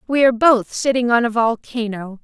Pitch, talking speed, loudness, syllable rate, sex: 235 Hz, 190 wpm, -17 LUFS, 5.3 syllables/s, female